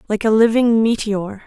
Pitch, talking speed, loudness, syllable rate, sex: 220 Hz, 165 wpm, -16 LUFS, 4.7 syllables/s, female